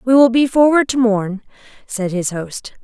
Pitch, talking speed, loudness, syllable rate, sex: 230 Hz, 190 wpm, -15 LUFS, 4.5 syllables/s, female